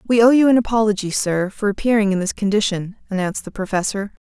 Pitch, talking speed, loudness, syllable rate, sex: 205 Hz, 195 wpm, -19 LUFS, 6.4 syllables/s, female